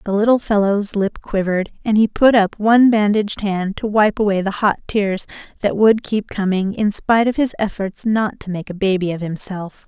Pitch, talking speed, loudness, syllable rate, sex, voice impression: 205 Hz, 205 wpm, -17 LUFS, 5.1 syllables/s, female, feminine, adult-like, sincere, slightly elegant, slightly kind